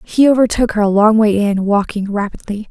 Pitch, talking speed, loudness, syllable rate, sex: 210 Hz, 200 wpm, -14 LUFS, 5.4 syllables/s, female